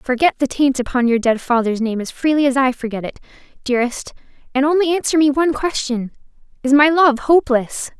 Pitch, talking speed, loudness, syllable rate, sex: 265 Hz, 190 wpm, -17 LUFS, 5.9 syllables/s, female